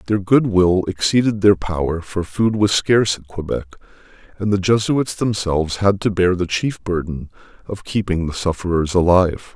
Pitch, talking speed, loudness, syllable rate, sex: 95 Hz, 170 wpm, -18 LUFS, 4.9 syllables/s, male